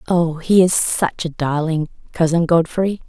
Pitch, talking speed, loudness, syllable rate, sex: 165 Hz, 155 wpm, -17 LUFS, 4.2 syllables/s, female